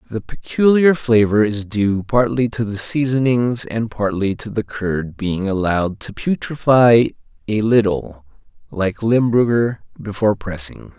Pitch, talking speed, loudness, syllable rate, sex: 110 Hz, 130 wpm, -18 LUFS, 4.2 syllables/s, male